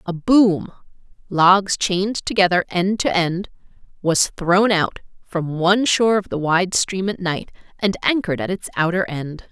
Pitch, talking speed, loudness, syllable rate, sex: 185 Hz, 165 wpm, -19 LUFS, 4.4 syllables/s, female